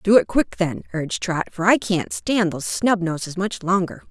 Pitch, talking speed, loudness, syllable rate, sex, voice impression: 185 Hz, 205 wpm, -21 LUFS, 4.9 syllables/s, female, feminine, slightly adult-like, clear, fluent, slightly intellectual, friendly, lively